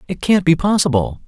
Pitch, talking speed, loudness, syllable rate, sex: 165 Hz, 190 wpm, -16 LUFS, 5.6 syllables/s, male